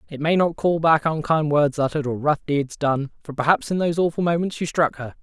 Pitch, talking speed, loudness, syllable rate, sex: 155 Hz, 230 wpm, -21 LUFS, 5.7 syllables/s, male